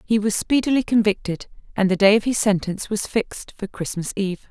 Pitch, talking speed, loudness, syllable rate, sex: 205 Hz, 200 wpm, -21 LUFS, 5.9 syllables/s, female